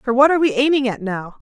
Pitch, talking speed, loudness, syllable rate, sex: 250 Hz, 285 wpm, -17 LUFS, 6.8 syllables/s, female